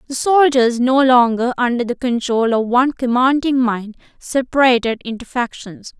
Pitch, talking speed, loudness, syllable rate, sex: 250 Hz, 140 wpm, -16 LUFS, 4.7 syllables/s, female